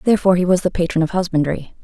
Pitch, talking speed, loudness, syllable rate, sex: 175 Hz, 230 wpm, -18 LUFS, 7.9 syllables/s, female